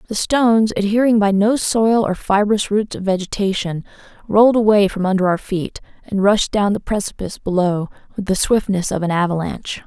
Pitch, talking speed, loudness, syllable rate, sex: 200 Hz, 175 wpm, -17 LUFS, 5.5 syllables/s, female